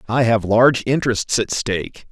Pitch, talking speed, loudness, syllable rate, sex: 115 Hz, 170 wpm, -18 LUFS, 5.2 syllables/s, male